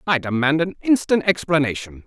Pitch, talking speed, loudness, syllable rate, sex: 155 Hz, 145 wpm, -19 LUFS, 5.5 syllables/s, male